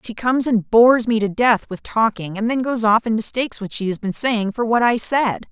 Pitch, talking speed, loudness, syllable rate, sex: 225 Hz, 260 wpm, -18 LUFS, 5.4 syllables/s, female